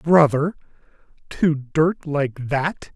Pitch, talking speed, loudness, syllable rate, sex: 150 Hz, 80 wpm, -21 LUFS, 2.9 syllables/s, male